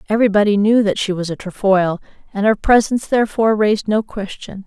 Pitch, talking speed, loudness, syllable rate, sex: 205 Hz, 180 wpm, -16 LUFS, 6.2 syllables/s, female